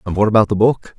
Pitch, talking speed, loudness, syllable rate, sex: 105 Hz, 305 wpm, -15 LUFS, 7.0 syllables/s, male